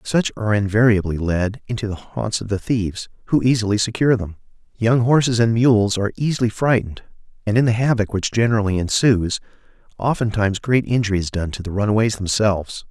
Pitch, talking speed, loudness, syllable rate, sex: 110 Hz, 170 wpm, -19 LUFS, 6.1 syllables/s, male